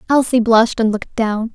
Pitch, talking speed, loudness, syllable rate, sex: 230 Hz, 195 wpm, -16 LUFS, 6.3 syllables/s, female